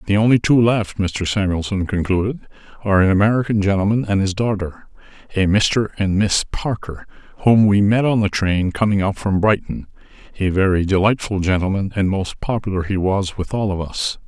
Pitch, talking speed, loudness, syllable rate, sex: 100 Hz, 170 wpm, -18 LUFS, 5.3 syllables/s, male